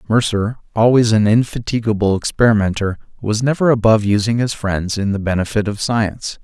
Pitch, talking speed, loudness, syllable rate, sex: 110 Hz, 150 wpm, -17 LUFS, 5.8 syllables/s, male